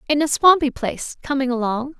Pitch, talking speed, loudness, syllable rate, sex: 270 Hz, 180 wpm, -19 LUFS, 5.8 syllables/s, female